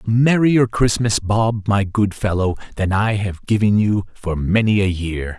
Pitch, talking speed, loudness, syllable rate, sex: 105 Hz, 180 wpm, -18 LUFS, 4.3 syllables/s, male